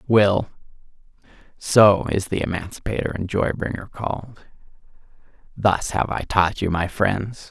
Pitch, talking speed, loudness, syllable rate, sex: 100 Hz, 120 wpm, -21 LUFS, 4.3 syllables/s, male